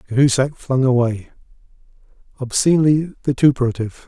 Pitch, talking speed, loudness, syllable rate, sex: 130 Hz, 75 wpm, -17 LUFS, 5.8 syllables/s, male